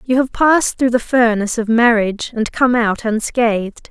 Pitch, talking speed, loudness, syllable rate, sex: 235 Hz, 185 wpm, -15 LUFS, 5.0 syllables/s, female